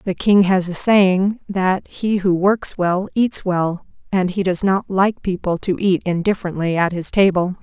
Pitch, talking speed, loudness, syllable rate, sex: 185 Hz, 190 wpm, -18 LUFS, 4.3 syllables/s, female